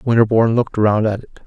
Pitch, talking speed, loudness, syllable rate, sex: 110 Hz, 205 wpm, -16 LUFS, 7.3 syllables/s, male